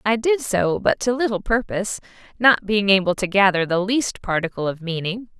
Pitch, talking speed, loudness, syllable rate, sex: 205 Hz, 190 wpm, -20 LUFS, 5.2 syllables/s, female